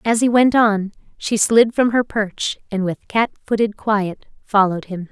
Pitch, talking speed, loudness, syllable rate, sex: 215 Hz, 190 wpm, -18 LUFS, 4.3 syllables/s, female